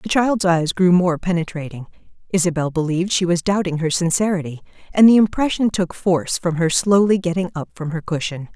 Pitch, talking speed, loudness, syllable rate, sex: 175 Hz, 180 wpm, -18 LUFS, 5.7 syllables/s, female